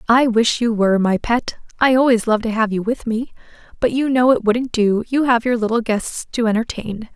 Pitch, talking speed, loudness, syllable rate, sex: 230 Hz, 225 wpm, -18 LUFS, 5.2 syllables/s, female